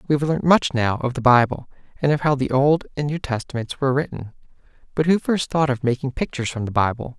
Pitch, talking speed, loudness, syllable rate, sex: 135 Hz, 235 wpm, -21 LUFS, 6.2 syllables/s, male